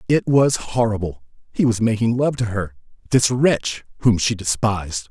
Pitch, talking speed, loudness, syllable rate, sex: 110 Hz, 165 wpm, -19 LUFS, 4.7 syllables/s, male